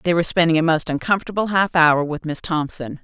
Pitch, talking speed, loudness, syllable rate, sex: 165 Hz, 220 wpm, -19 LUFS, 6.2 syllables/s, female